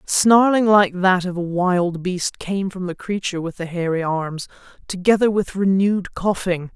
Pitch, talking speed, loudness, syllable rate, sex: 185 Hz, 170 wpm, -19 LUFS, 4.5 syllables/s, female